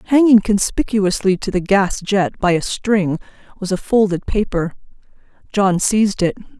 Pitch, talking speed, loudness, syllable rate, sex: 195 Hz, 145 wpm, -17 LUFS, 4.8 syllables/s, female